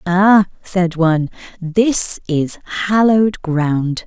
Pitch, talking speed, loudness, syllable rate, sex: 180 Hz, 105 wpm, -16 LUFS, 3.0 syllables/s, female